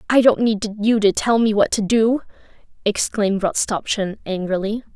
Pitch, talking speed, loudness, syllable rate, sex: 210 Hz, 155 wpm, -19 LUFS, 4.8 syllables/s, female